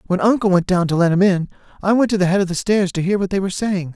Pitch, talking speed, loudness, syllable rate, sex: 190 Hz, 335 wpm, -18 LUFS, 7.0 syllables/s, male